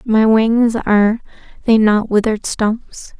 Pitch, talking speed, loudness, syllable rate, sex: 220 Hz, 130 wpm, -15 LUFS, 3.8 syllables/s, female